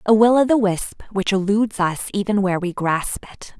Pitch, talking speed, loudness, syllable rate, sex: 205 Hz, 200 wpm, -19 LUFS, 5.1 syllables/s, female